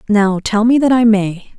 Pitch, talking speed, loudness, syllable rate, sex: 215 Hz, 225 wpm, -13 LUFS, 4.4 syllables/s, female